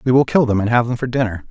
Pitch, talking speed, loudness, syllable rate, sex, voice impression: 120 Hz, 360 wpm, -17 LUFS, 7.2 syllables/s, male, masculine, adult-like, fluent, refreshing, sincere, friendly, kind